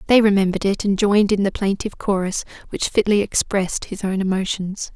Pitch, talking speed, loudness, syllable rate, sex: 200 Hz, 180 wpm, -20 LUFS, 6.0 syllables/s, female